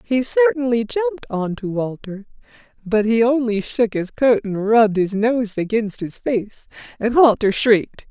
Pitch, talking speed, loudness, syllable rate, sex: 230 Hz, 165 wpm, -18 LUFS, 4.4 syllables/s, female